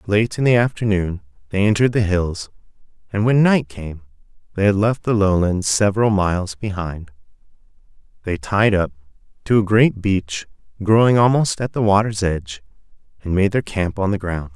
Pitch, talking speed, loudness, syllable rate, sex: 100 Hz, 165 wpm, -18 LUFS, 5.1 syllables/s, male